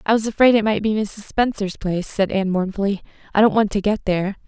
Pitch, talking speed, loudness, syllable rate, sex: 205 Hz, 240 wpm, -20 LUFS, 6.4 syllables/s, female